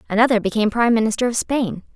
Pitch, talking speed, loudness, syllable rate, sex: 225 Hz, 185 wpm, -19 LUFS, 7.7 syllables/s, female